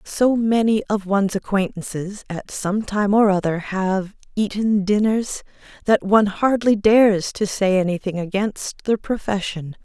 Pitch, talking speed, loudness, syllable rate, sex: 200 Hz, 140 wpm, -20 LUFS, 4.3 syllables/s, female